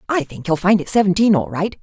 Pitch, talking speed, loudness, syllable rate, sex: 190 Hz, 265 wpm, -17 LUFS, 6.1 syllables/s, female